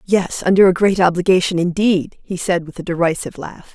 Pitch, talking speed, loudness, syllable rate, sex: 180 Hz, 190 wpm, -16 LUFS, 5.5 syllables/s, female